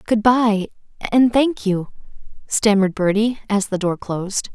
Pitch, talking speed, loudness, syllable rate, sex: 210 Hz, 120 wpm, -19 LUFS, 4.6 syllables/s, female